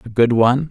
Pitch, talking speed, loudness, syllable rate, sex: 120 Hz, 255 wpm, -15 LUFS, 6.8 syllables/s, male